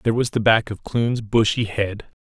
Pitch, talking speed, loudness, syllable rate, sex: 110 Hz, 215 wpm, -21 LUFS, 5.0 syllables/s, male